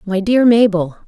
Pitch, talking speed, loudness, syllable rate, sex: 205 Hz, 165 wpm, -13 LUFS, 4.6 syllables/s, female